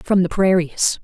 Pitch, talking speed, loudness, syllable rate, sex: 180 Hz, 175 wpm, -17 LUFS, 4.4 syllables/s, female